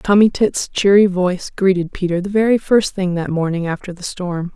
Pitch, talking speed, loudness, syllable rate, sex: 190 Hz, 200 wpm, -17 LUFS, 5.2 syllables/s, female